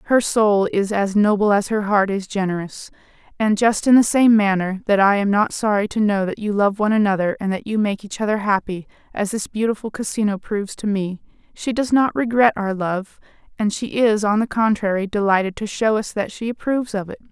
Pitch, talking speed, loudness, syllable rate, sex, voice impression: 210 Hz, 220 wpm, -19 LUFS, 5.5 syllables/s, female, very feminine, slightly young, adult-like, very thin, slightly tensed, slightly weak, bright, hard, slightly muffled, fluent, slightly raspy, cute, intellectual, very refreshing, sincere, very calm, friendly, reassuring, very unique, elegant, slightly wild, very sweet, slightly lively, very kind, very modest, light